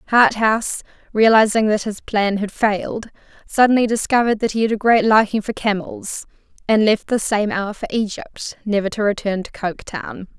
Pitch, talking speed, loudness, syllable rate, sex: 215 Hz, 165 wpm, -18 LUFS, 5.2 syllables/s, female